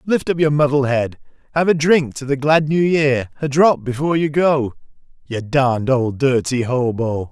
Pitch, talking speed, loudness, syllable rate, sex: 140 Hz, 190 wpm, -17 LUFS, 4.7 syllables/s, male